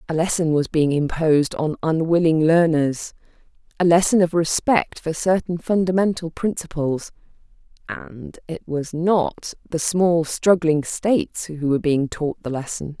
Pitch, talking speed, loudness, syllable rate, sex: 165 Hz, 140 wpm, -20 LUFS, 4.3 syllables/s, female